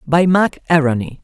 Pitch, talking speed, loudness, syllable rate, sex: 155 Hz, 145 wpm, -15 LUFS, 5.1 syllables/s, male